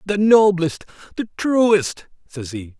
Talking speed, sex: 130 wpm, male